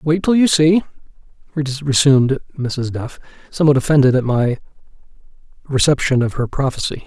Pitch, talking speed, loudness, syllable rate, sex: 140 Hz, 125 wpm, -16 LUFS, 5.0 syllables/s, male